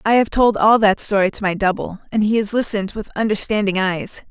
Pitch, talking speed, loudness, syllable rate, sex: 205 Hz, 225 wpm, -18 LUFS, 5.7 syllables/s, female